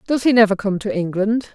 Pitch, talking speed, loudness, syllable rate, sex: 210 Hz, 235 wpm, -18 LUFS, 5.9 syllables/s, female